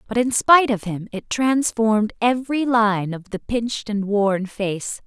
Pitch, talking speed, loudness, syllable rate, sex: 220 Hz, 180 wpm, -20 LUFS, 4.5 syllables/s, female